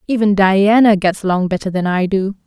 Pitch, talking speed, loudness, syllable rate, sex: 195 Hz, 195 wpm, -14 LUFS, 5.3 syllables/s, female